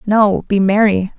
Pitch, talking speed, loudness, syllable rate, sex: 205 Hz, 150 wpm, -14 LUFS, 4.0 syllables/s, female